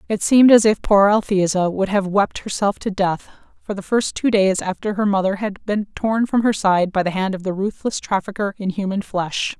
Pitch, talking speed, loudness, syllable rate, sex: 200 Hz, 225 wpm, -19 LUFS, 5.1 syllables/s, female